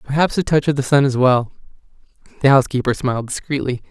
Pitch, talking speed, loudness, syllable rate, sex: 135 Hz, 185 wpm, -17 LUFS, 6.8 syllables/s, male